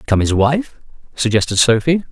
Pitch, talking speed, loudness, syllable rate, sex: 130 Hz, 140 wpm, -15 LUFS, 5.9 syllables/s, male